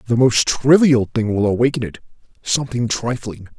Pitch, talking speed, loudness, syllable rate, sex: 120 Hz, 135 wpm, -17 LUFS, 5.2 syllables/s, male